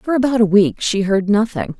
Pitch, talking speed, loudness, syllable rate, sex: 210 Hz, 235 wpm, -16 LUFS, 5.1 syllables/s, female